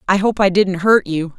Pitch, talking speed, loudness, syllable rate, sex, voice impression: 190 Hz, 260 wpm, -15 LUFS, 5.0 syllables/s, female, slightly feminine, slightly gender-neutral, adult-like, middle-aged, slightly thick, tensed, powerful, slightly bright, hard, clear, fluent, slightly raspy, slightly cool, slightly intellectual, slightly sincere, calm, slightly mature, friendly, slightly reassuring, unique, very wild, slightly lively, very strict, slightly intense, sharp